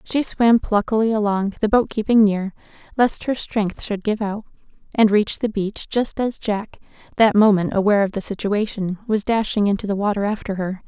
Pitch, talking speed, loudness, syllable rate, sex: 210 Hz, 190 wpm, -20 LUFS, 5.2 syllables/s, female